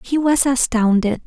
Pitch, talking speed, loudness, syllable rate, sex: 250 Hz, 140 wpm, -16 LUFS, 4.4 syllables/s, female